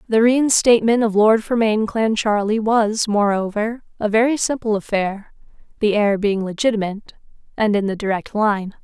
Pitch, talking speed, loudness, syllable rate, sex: 215 Hz, 145 wpm, -18 LUFS, 4.9 syllables/s, female